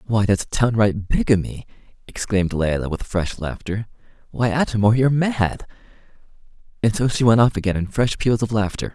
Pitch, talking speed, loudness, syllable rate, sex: 110 Hz, 170 wpm, -20 LUFS, 5.3 syllables/s, male